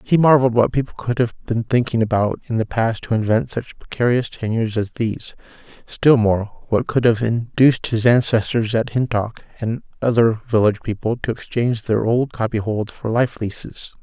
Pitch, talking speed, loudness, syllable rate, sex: 115 Hz, 175 wpm, -19 LUFS, 5.2 syllables/s, male